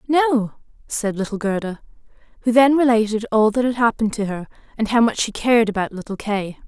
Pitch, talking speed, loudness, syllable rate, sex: 225 Hz, 190 wpm, -19 LUFS, 5.7 syllables/s, female